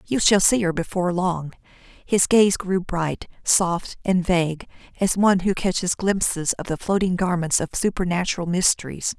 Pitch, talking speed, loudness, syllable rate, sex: 180 Hz, 165 wpm, -21 LUFS, 4.7 syllables/s, female